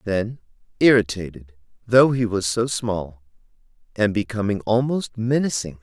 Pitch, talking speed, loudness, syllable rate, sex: 110 Hz, 115 wpm, -21 LUFS, 4.4 syllables/s, male